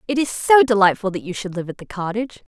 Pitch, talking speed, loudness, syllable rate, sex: 215 Hz, 260 wpm, -19 LUFS, 6.5 syllables/s, female